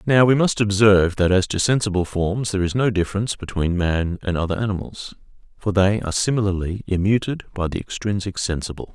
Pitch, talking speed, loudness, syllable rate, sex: 100 Hz, 180 wpm, -21 LUFS, 6.0 syllables/s, male